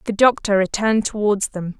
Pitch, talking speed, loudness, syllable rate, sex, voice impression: 205 Hz, 165 wpm, -19 LUFS, 5.5 syllables/s, female, feminine, adult-like, powerful, soft, slightly raspy, calm, friendly, reassuring, elegant, kind, modest